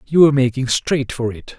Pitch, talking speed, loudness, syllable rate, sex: 130 Hz, 230 wpm, -17 LUFS, 5.5 syllables/s, male